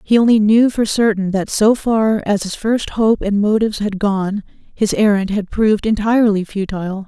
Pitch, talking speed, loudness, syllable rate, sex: 210 Hz, 185 wpm, -16 LUFS, 4.9 syllables/s, female